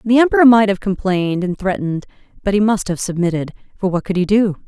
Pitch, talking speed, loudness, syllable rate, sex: 195 Hz, 220 wpm, -16 LUFS, 6.3 syllables/s, female